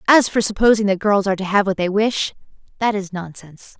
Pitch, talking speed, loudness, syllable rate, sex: 200 Hz, 220 wpm, -18 LUFS, 6.1 syllables/s, female